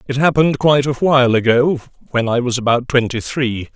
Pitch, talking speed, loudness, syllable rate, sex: 130 Hz, 190 wpm, -16 LUFS, 6.0 syllables/s, male